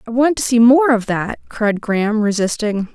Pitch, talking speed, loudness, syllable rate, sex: 230 Hz, 205 wpm, -16 LUFS, 4.9 syllables/s, female